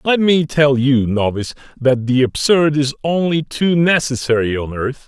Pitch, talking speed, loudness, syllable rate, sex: 140 Hz, 165 wpm, -16 LUFS, 4.5 syllables/s, male